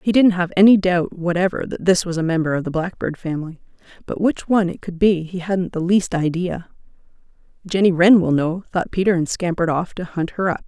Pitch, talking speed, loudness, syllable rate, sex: 180 Hz, 220 wpm, -19 LUFS, 5.8 syllables/s, female